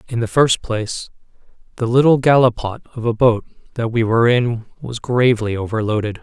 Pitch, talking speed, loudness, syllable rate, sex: 115 Hz, 165 wpm, -17 LUFS, 5.4 syllables/s, male